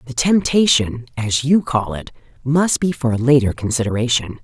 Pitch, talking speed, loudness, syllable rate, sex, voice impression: 130 Hz, 160 wpm, -17 LUFS, 4.9 syllables/s, female, feminine, middle-aged, slightly relaxed, powerful, slightly hard, muffled, slightly raspy, intellectual, calm, slightly mature, friendly, reassuring, unique, elegant, lively, slightly strict, slightly sharp